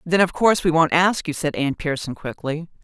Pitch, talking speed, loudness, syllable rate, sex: 160 Hz, 235 wpm, -20 LUFS, 5.7 syllables/s, female